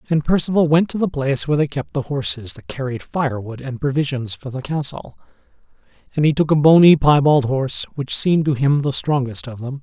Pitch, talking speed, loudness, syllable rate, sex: 140 Hz, 210 wpm, -18 LUFS, 5.8 syllables/s, male